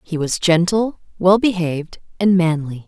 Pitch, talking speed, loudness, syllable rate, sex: 180 Hz, 145 wpm, -18 LUFS, 4.6 syllables/s, female